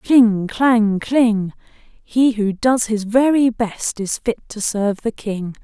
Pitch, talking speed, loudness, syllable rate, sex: 220 Hz, 160 wpm, -18 LUFS, 3.2 syllables/s, female